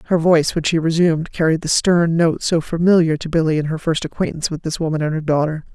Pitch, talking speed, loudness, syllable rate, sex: 160 Hz, 240 wpm, -18 LUFS, 6.4 syllables/s, female